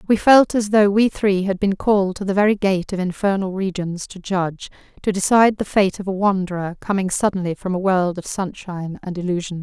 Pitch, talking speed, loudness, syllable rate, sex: 190 Hz, 210 wpm, -19 LUFS, 5.6 syllables/s, female